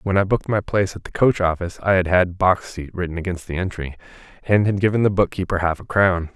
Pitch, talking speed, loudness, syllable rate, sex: 90 Hz, 255 wpm, -20 LUFS, 6.3 syllables/s, male